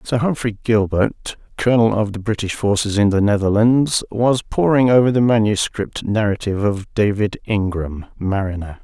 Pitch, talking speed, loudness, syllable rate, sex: 105 Hz, 145 wpm, -18 LUFS, 4.8 syllables/s, male